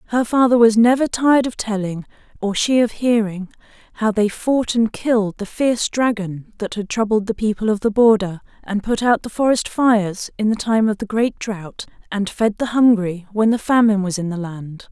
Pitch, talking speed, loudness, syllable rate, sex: 215 Hz, 205 wpm, -18 LUFS, 5.1 syllables/s, female